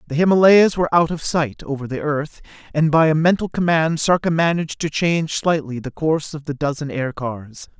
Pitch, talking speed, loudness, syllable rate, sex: 155 Hz, 195 wpm, -19 LUFS, 5.5 syllables/s, male